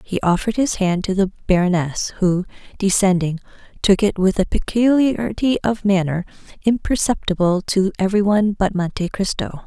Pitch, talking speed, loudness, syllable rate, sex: 195 Hz, 145 wpm, -19 LUFS, 5.2 syllables/s, female